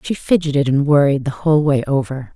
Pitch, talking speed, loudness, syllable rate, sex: 140 Hz, 205 wpm, -16 LUFS, 5.9 syllables/s, female